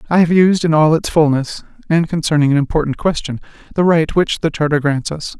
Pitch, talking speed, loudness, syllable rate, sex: 155 Hz, 210 wpm, -15 LUFS, 5.7 syllables/s, male